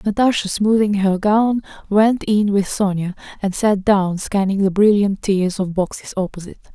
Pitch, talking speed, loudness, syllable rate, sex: 200 Hz, 160 wpm, -18 LUFS, 4.8 syllables/s, female